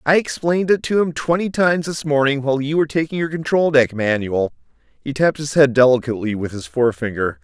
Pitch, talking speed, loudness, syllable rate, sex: 140 Hz, 200 wpm, -18 LUFS, 6.2 syllables/s, male